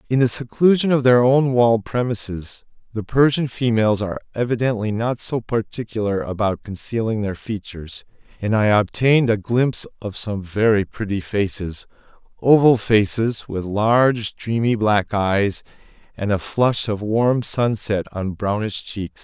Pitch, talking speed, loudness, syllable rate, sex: 110 Hz, 145 wpm, -20 LUFS, 4.6 syllables/s, male